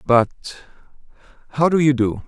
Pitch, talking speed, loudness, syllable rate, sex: 130 Hz, 130 wpm, -18 LUFS, 5.9 syllables/s, male